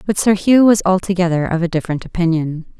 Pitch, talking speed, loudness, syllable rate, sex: 180 Hz, 195 wpm, -16 LUFS, 6.2 syllables/s, female